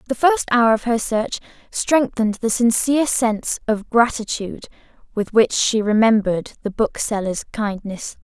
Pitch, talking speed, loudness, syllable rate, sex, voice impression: 225 Hz, 140 wpm, -19 LUFS, 4.8 syllables/s, female, very feminine, very young, very thin, very tensed, powerful, very bright, hard, very clear, slightly fluent, cute, intellectual, very refreshing, very sincere, slightly calm, very friendly, reassuring, very unique, elegant, wild, slightly sweet, very lively, strict, intense